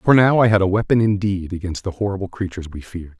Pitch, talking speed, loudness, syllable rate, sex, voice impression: 95 Hz, 245 wpm, -19 LUFS, 6.8 syllables/s, male, masculine, middle-aged, tensed, slightly powerful, soft, cool, calm, slightly mature, friendly, wild, lively, slightly kind, modest